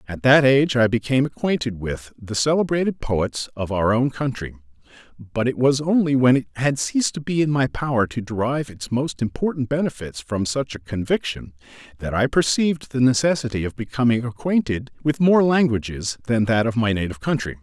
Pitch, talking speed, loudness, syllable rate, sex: 125 Hz, 185 wpm, -21 LUFS, 5.6 syllables/s, male